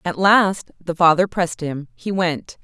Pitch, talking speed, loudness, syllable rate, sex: 175 Hz, 135 wpm, -18 LUFS, 4.2 syllables/s, female